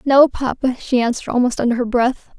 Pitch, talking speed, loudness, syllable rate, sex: 250 Hz, 200 wpm, -18 LUFS, 6.1 syllables/s, female